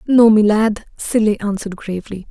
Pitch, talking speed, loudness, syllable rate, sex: 210 Hz, 155 wpm, -16 LUFS, 5.5 syllables/s, female